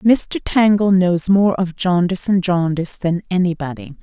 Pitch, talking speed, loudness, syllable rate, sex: 180 Hz, 150 wpm, -17 LUFS, 4.7 syllables/s, female